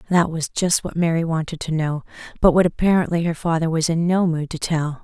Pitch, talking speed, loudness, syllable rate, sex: 165 Hz, 225 wpm, -20 LUFS, 5.6 syllables/s, female